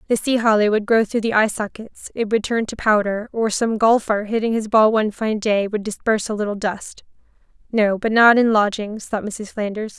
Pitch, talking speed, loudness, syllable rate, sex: 215 Hz, 210 wpm, -19 LUFS, 5.2 syllables/s, female